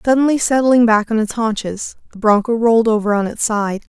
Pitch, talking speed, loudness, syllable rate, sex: 225 Hz, 195 wpm, -16 LUFS, 5.6 syllables/s, female